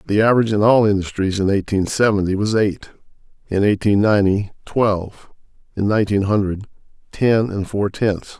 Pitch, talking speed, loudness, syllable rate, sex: 100 Hz, 150 wpm, -18 LUFS, 5.5 syllables/s, male